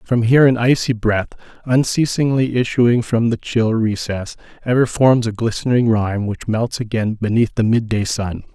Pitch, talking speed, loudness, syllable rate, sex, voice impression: 115 Hz, 160 wpm, -17 LUFS, 4.7 syllables/s, male, masculine, adult-like, slightly thick, cool, sincere, slightly calm, kind